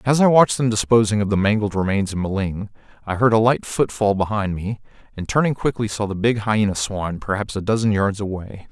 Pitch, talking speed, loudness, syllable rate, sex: 105 Hz, 215 wpm, -20 LUFS, 5.7 syllables/s, male